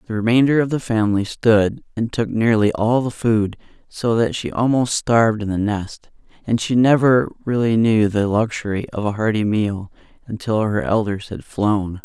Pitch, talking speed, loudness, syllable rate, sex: 110 Hz, 180 wpm, -19 LUFS, 4.7 syllables/s, male